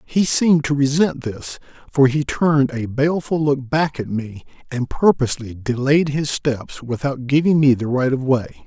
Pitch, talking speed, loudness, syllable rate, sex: 135 Hz, 180 wpm, -19 LUFS, 4.8 syllables/s, male